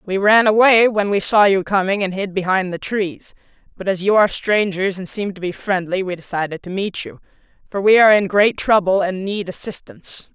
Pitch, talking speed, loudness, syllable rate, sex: 195 Hz, 215 wpm, -17 LUFS, 5.3 syllables/s, female